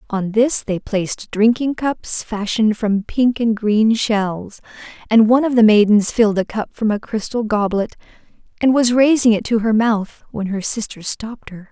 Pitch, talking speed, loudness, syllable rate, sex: 220 Hz, 185 wpm, -17 LUFS, 4.7 syllables/s, female